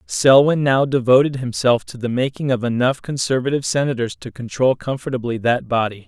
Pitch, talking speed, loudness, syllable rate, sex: 130 Hz, 160 wpm, -18 LUFS, 5.6 syllables/s, male